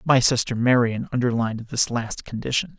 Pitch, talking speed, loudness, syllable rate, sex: 120 Hz, 150 wpm, -22 LUFS, 5.3 syllables/s, male